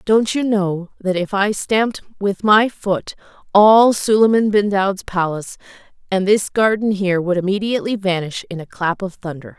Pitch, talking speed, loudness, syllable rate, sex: 200 Hz, 170 wpm, -17 LUFS, 4.8 syllables/s, female